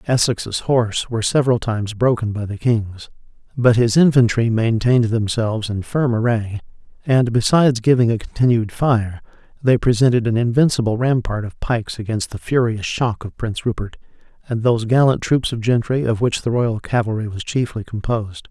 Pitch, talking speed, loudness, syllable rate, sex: 115 Hz, 165 wpm, -18 LUFS, 5.4 syllables/s, male